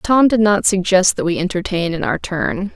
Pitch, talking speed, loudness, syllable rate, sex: 190 Hz, 220 wpm, -16 LUFS, 4.8 syllables/s, female